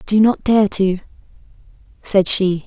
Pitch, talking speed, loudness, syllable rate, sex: 200 Hz, 155 wpm, -16 LUFS, 4.4 syllables/s, female